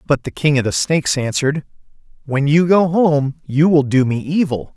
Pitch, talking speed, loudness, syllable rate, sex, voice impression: 145 Hz, 200 wpm, -16 LUFS, 5.1 syllables/s, male, masculine, adult-like, thick, tensed, slightly powerful, bright, soft, cool, calm, friendly, reassuring, wild, lively, kind, slightly modest